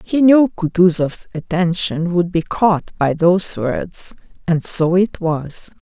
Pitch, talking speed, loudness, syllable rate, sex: 180 Hz, 145 wpm, -17 LUFS, 3.6 syllables/s, female